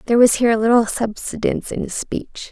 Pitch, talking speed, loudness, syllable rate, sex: 230 Hz, 215 wpm, -18 LUFS, 6.4 syllables/s, female